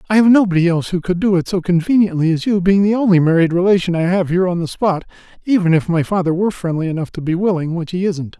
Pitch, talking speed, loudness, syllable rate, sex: 180 Hz, 255 wpm, -16 LUFS, 6.8 syllables/s, male